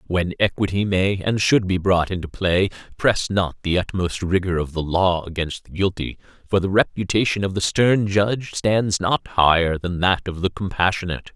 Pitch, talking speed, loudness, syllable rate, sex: 95 Hz, 185 wpm, -21 LUFS, 4.9 syllables/s, male